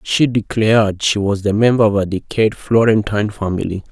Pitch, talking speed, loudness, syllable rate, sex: 105 Hz, 170 wpm, -16 LUFS, 5.3 syllables/s, male